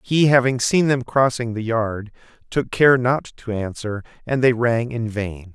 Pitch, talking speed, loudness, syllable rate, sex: 120 Hz, 185 wpm, -20 LUFS, 4.1 syllables/s, male